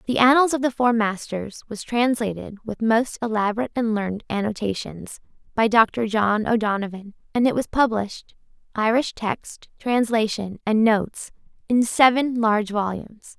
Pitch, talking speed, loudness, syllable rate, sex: 225 Hz, 130 wpm, -22 LUFS, 4.8 syllables/s, female